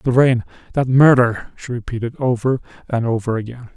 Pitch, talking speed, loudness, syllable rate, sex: 120 Hz, 145 wpm, -18 LUFS, 5.3 syllables/s, male